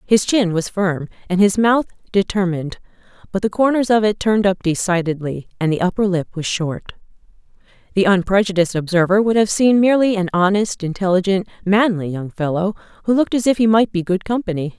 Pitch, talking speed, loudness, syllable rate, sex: 195 Hz, 180 wpm, -18 LUFS, 5.9 syllables/s, female